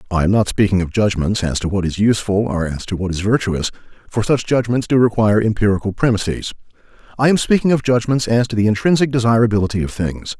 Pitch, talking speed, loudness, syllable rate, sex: 105 Hz, 210 wpm, -17 LUFS, 6.7 syllables/s, male